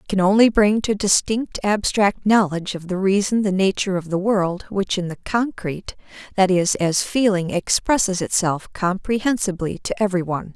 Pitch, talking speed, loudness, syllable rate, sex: 195 Hz, 170 wpm, -20 LUFS, 5.1 syllables/s, female